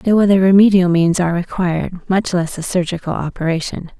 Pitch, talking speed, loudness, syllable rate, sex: 180 Hz, 165 wpm, -16 LUFS, 5.8 syllables/s, female